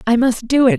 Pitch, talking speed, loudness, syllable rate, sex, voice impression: 245 Hz, 305 wpm, -16 LUFS, 5.7 syllables/s, female, feminine, adult-like, slightly tensed, slightly powerful, soft, clear, intellectual, calm, elegant, slightly sharp